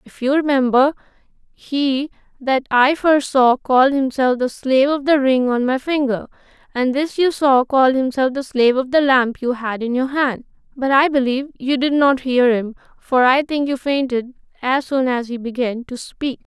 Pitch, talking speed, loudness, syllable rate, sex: 265 Hz, 195 wpm, -17 LUFS, 4.8 syllables/s, female